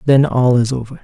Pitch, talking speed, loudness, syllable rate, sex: 125 Hz, 230 wpm, -14 LUFS, 5.8 syllables/s, male